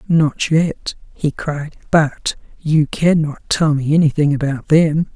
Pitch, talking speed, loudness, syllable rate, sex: 155 Hz, 140 wpm, -17 LUFS, 3.6 syllables/s, female